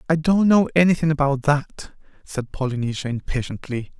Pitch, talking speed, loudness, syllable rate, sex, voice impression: 145 Hz, 135 wpm, -21 LUFS, 5.3 syllables/s, male, masculine, adult-like, soft, slightly refreshing, friendly, reassuring, kind